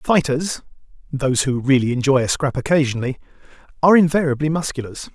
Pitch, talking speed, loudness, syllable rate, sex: 140 Hz, 105 wpm, -18 LUFS, 6.4 syllables/s, male